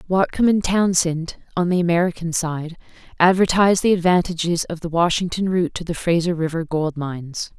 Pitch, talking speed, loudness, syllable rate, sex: 170 Hz, 160 wpm, -20 LUFS, 5.6 syllables/s, female